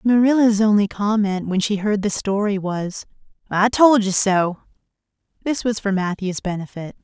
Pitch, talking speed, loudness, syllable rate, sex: 205 Hz, 155 wpm, -19 LUFS, 4.7 syllables/s, female